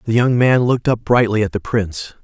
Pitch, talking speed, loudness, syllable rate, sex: 110 Hz, 240 wpm, -16 LUFS, 5.9 syllables/s, male